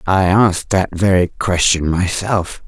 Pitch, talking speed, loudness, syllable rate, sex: 95 Hz, 135 wpm, -15 LUFS, 4.0 syllables/s, female